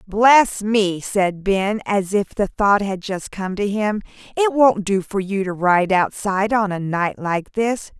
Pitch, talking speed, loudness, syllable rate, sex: 200 Hz, 195 wpm, -19 LUFS, 3.8 syllables/s, female